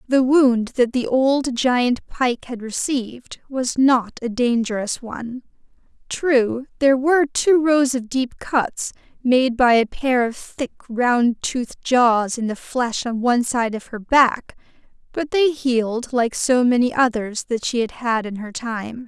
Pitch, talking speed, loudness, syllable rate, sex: 245 Hz, 170 wpm, -20 LUFS, 3.9 syllables/s, female